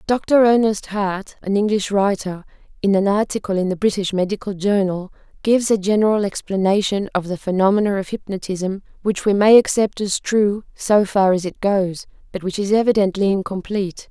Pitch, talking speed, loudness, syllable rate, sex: 200 Hz, 165 wpm, -19 LUFS, 5.2 syllables/s, female